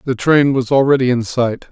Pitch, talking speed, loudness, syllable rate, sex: 130 Hz, 210 wpm, -14 LUFS, 5.2 syllables/s, male